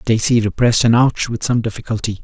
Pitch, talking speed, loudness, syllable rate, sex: 115 Hz, 190 wpm, -16 LUFS, 5.9 syllables/s, male